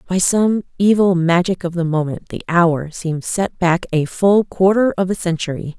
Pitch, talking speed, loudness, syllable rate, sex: 175 Hz, 185 wpm, -17 LUFS, 4.7 syllables/s, female